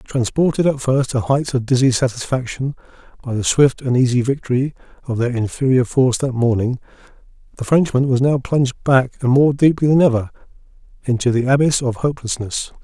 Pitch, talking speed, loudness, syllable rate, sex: 130 Hz, 170 wpm, -17 LUFS, 5.6 syllables/s, male